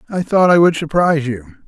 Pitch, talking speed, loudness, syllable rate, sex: 155 Hz, 215 wpm, -14 LUFS, 5.8 syllables/s, male